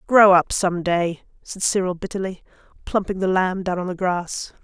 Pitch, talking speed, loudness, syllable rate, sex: 185 Hz, 180 wpm, -21 LUFS, 4.7 syllables/s, female